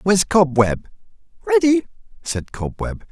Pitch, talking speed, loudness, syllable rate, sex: 150 Hz, 95 wpm, -19 LUFS, 4.4 syllables/s, male